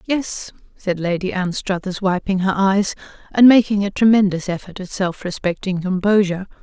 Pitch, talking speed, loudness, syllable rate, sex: 190 Hz, 145 wpm, -18 LUFS, 5.0 syllables/s, female